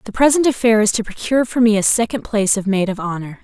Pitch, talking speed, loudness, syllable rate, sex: 220 Hz, 260 wpm, -16 LUFS, 6.7 syllables/s, female